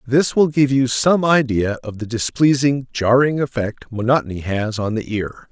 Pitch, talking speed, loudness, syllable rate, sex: 125 Hz, 175 wpm, -18 LUFS, 4.6 syllables/s, male